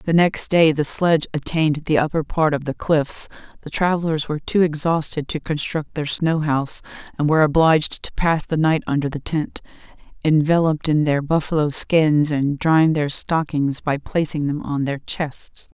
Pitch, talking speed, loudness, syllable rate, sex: 155 Hz, 180 wpm, -20 LUFS, 4.8 syllables/s, female